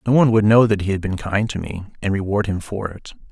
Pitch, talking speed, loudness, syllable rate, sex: 100 Hz, 290 wpm, -19 LUFS, 6.2 syllables/s, male